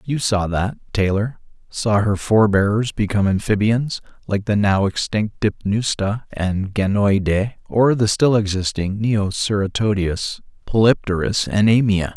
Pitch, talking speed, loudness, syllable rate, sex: 105 Hz, 115 wpm, -19 LUFS, 4.3 syllables/s, male